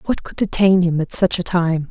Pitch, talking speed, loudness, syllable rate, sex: 175 Hz, 250 wpm, -17 LUFS, 5.1 syllables/s, female